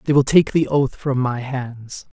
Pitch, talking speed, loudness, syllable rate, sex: 135 Hz, 220 wpm, -19 LUFS, 4.2 syllables/s, male